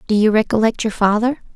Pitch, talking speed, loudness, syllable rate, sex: 220 Hz, 195 wpm, -17 LUFS, 6.1 syllables/s, female